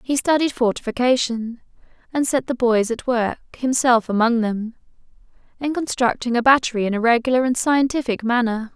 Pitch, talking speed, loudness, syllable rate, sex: 245 Hz, 150 wpm, -20 LUFS, 5.3 syllables/s, female